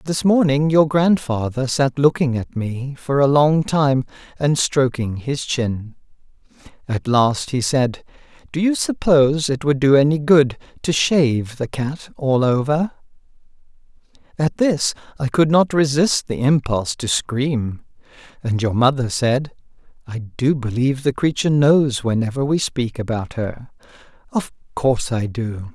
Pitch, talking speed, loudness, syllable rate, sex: 135 Hz, 145 wpm, -19 LUFS, 4.2 syllables/s, male